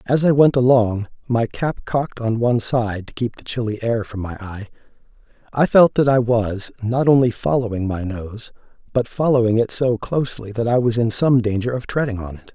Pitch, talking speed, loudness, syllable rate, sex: 115 Hz, 205 wpm, -19 LUFS, 5.2 syllables/s, male